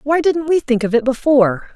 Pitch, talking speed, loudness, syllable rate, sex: 265 Hz, 240 wpm, -16 LUFS, 5.5 syllables/s, female